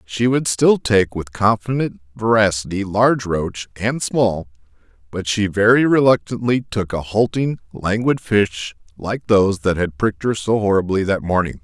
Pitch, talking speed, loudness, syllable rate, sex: 105 Hz, 155 wpm, -18 LUFS, 4.5 syllables/s, male